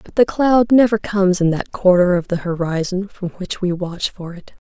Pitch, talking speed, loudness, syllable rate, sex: 190 Hz, 220 wpm, -17 LUFS, 4.9 syllables/s, female